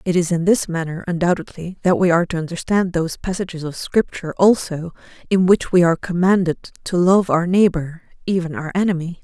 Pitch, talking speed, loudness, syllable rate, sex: 175 Hz, 180 wpm, -19 LUFS, 5.8 syllables/s, female